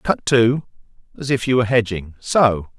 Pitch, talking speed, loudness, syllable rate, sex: 115 Hz, 150 wpm, -18 LUFS, 4.6 syllables/s, male